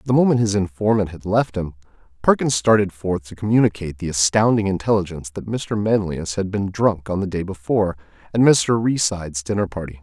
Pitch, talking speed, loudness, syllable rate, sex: 100 Hz, 180 wpm, -20 LUFS, 5.8 syllables/s, male